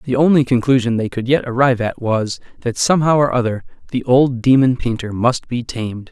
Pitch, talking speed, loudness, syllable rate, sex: 125 Hz, 195 wpm, -17 LUFS, 5.7 syllables/s, male